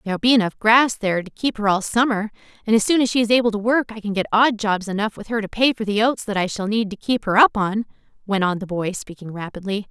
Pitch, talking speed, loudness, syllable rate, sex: 210 Hz, 285 wpm, -20 LUFS, 6.3 syllables/s, female